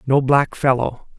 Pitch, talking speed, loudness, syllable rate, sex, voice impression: 135 Hz, 150 wpm, -18 LUFS, 4.0 syllables/s, male, very masculine, very middle-aged, thick, tensed, powerful, bright, slightly hard, clear, fluent, slightly raspy, cool, very intellectual, refreshing, sincere, calm, mature, friendly, reassuring, unique, slightly elegant, very wild, slightly sweet, lively, slightly kind, slightly intense